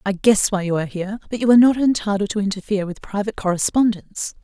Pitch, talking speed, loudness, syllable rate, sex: 205 Hz, 215 wpm, -19 LUFS, 7.2 syllables/s, female